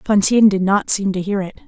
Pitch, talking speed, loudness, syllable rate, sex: 200 Hz, 250 wpm, -16 LUFS, 5.8 syllables/s, female